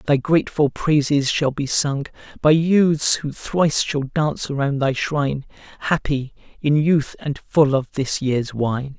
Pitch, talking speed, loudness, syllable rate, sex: 145 Hz, 160 wpm, -20 LUFS, 4.1 syllables/s, male